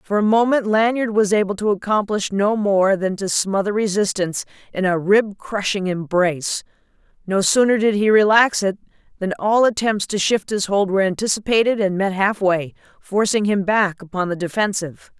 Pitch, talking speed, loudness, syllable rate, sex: 200 Hz, 175 wpm, -19 LUFS, 5.2 syllables/s, female